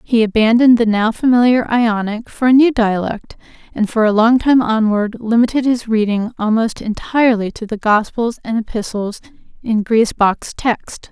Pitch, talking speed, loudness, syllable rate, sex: 225 Hz, 155 wpm, -15 LUFS, 4.8 syllables/s, female